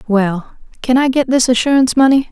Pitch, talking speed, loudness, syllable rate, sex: 250 Hz, 180 wpm, -13 LUFS, 5.8 syllables/s, female